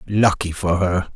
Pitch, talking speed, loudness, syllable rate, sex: 90 Hz, 155 wpm, -20 LUFS, 4.0 syllables/s, male